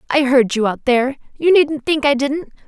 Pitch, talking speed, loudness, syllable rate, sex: 275 Hz, 200 wpm, -16 LUFS, 5.2 syllables/s, female